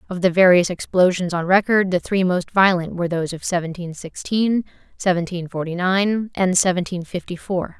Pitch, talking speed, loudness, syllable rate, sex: 180 Hz, 170 wpm, -20 LUFS, 5.2 syllables/s, female